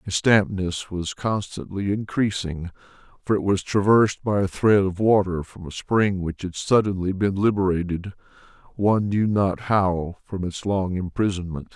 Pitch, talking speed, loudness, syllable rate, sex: 95 Hz, 155 wpm, -23 LUFS, 4.6 syllables/s, male